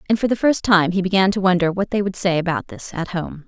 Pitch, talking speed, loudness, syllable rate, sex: 185 Hz, 295 wpm, -19 LUFS, 6.1 syllables/s, female